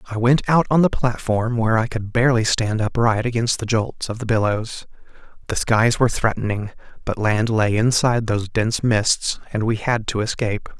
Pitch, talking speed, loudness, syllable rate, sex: 115 Hz, 190 wpm, -20 LUFS, 5.3 syllables/s, male